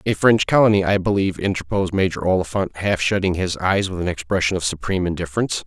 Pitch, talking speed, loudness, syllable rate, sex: 95 Hz, 190 wpm, -20 LUFS, 6.7 syllables/s, male